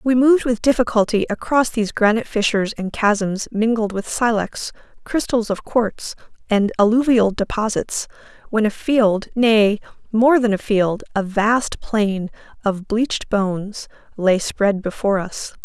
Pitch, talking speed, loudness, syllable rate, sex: 215 Hz, 140 wpm, -19 LUFS, 4.4 syllables/s, female